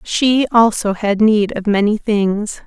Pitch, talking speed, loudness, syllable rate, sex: 215 Hz, 160 wpm, -15 LUFS, 3.6 syllables/s, female